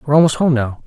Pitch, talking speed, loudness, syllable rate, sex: 140 Hz, 280 wpm, -15 LUFS, 8.6 syllables/s, male